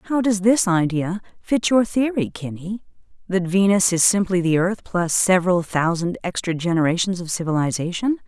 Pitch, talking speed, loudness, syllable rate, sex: 185 Hz, 145 wpm, -20 LUFS, 5.0 syllables/s, female